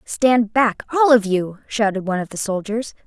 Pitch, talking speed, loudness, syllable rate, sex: 220 Hz, 195 wpm, -19 LUFS, 4.9 syllables/s, female